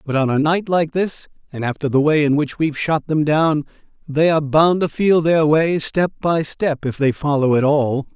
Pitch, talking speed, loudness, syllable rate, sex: 150 Hz, 235 wpm, -18 LUFS, 4.9 syllables/s, male